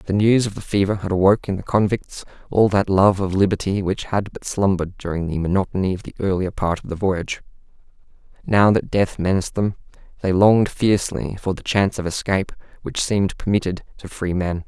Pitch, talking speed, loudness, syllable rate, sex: 95 Hz, 190 wpm, -20 LUFS, 5.8 syllables/s, male